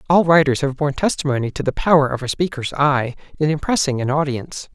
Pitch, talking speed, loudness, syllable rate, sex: 145 Hz, 200 wpm, -19 LUFS, 6.3 syllables/s, male